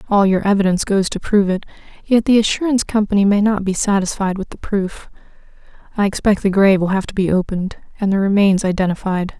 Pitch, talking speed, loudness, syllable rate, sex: 200 Hz, 200 wpm, -17 LUFS, 6.5 syllables/s, female